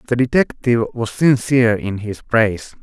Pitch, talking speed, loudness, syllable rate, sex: 115 Hz, 150 wpm, -17 LUFS, 5.2 syllables/s, male